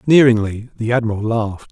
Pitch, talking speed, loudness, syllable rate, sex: 115 Hz, 140 wpm, -17 LUFS, 6.1 syllables/s, male